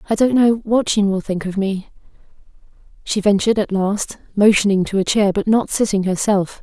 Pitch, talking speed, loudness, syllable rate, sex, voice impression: 200 Hz, 190 wpm, -17 LUFS, 5.3 syllables/s, female, feminine, adult-like, relaxed, slightly weak, slightly dark, muffled, intellectual, slightly calm, unique, sharp